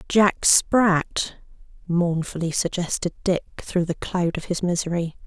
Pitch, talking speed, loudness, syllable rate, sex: 175 Hz, 125 wpm, -22 LUFS, 3.9 syllables/s, female